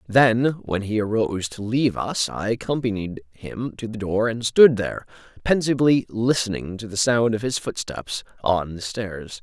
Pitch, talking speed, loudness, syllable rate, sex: 110 Hz, 170 wpm, -22 LUFS, 4.7 syllables/s, male